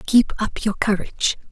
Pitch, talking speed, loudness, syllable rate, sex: 210 Hz, 160 wpm, -21 LUFS, 5.0 syllables/s, female